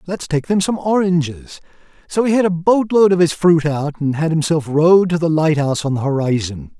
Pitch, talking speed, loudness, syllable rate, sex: 165 Hz, 210 wpm, -16 LUFS, 5.4 syllables/s, male